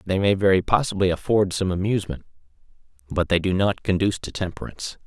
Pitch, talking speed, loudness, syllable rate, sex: 95 Hz, 165 wpm, -22 LUFS, 6.4 syllables/s, male